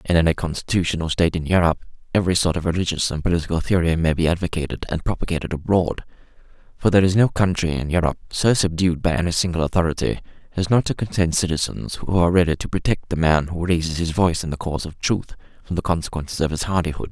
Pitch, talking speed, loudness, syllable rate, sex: 85 Hz, 205 wpm, -21 LUFS, 7.0 syllables/s, male